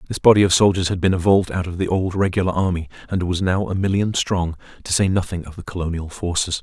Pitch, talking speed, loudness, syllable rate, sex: 90 Hz, 235 wpm, -20 LUFS, 6.3 syllables/s, male